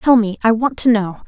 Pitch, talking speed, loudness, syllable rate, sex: 225 Hz, 280 wpm, -16 LUFS, 5.3 syllables/s, female